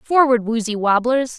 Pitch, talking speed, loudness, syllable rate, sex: 240 Hz, 130 wpm, -18 LUFS, 4.3 syllables/s, female